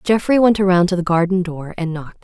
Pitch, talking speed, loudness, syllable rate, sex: 180 Hz, 240 wpm, -17 LUFS, 6.0 syllables/s, female